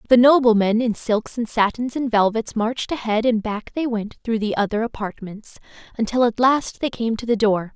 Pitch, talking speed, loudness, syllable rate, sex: 230 Hz, 200 wpm, -20 LUFS, 5.1 syllables/s, female